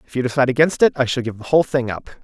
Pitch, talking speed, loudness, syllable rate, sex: 135 Hz, 320 wpm, -18 LUFS, 8.5 syllables/s, male